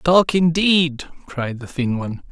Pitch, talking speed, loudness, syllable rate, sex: 150 Hz, 155 wpm, -19 LUFS, 4.0 syllables/s, male